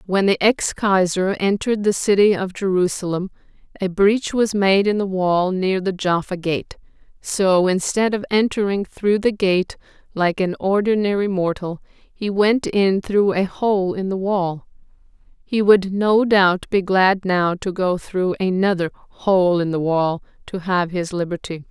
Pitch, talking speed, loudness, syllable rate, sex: 190 Hz, 165 wpm, -19 LUFS, 4.2 syllables/s, female